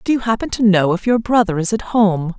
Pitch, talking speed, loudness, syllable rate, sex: 205 Hz, 275 wpm, -16 LUFS, 5.7 syllables/s, female